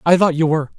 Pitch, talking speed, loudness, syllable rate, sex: 160 Hz, 305 wpm, -16 LUFS, 8.1 syllables/s, male